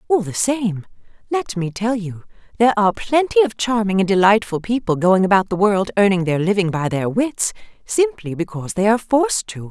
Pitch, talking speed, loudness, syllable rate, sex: 205 Hz, 185 wpm, -18 LUFS, 5.5 syllables/s, female